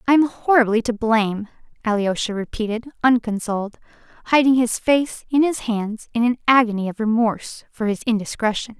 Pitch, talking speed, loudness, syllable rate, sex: 230 Hz, 150 wpm, -20 LUFS, 5.4 syllables/s, female